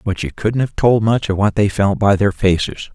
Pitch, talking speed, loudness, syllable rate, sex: 100 Hz, 265 wpm, -16 LUFS, 5.0 syllables/s, male